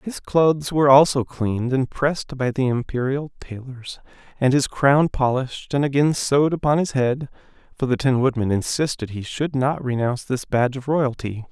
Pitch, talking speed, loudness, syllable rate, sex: 135 Hz, 175 wpm, -21 LUFS, 5.2 syllables/s, male